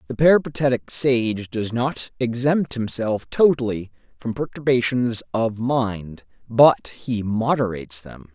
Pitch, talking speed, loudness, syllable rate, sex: 115 Hz, 115 wpm, -21 LUFS, 4.0 syllables/s, male